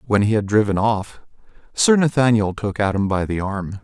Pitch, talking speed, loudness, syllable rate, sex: 105 Hz, 190 wpm, -19 LUFS, 5.0 syllables/s, male